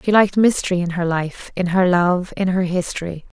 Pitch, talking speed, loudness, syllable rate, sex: 180 Hz, 210 wpm, -19 LUFS, 5.3 syllables/s, female